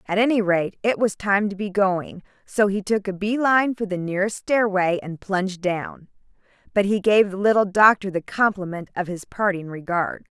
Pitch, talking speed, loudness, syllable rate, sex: 195 Hz, 195 wpm, -22 LUFS, 4.9 syllables/s, female